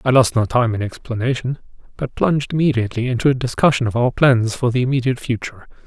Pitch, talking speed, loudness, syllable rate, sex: 125 Hz, 195 wpm, -18 LUFS, 6.7 syllables/s, male